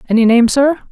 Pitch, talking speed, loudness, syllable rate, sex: 250 Hz, 195 wpm, -12 LUFS, 6.4 syllables/s, female